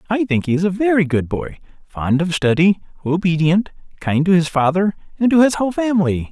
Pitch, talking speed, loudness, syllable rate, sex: 180 Hz, 190 wpm, -17 LUFS, 5.5 syllables/s, male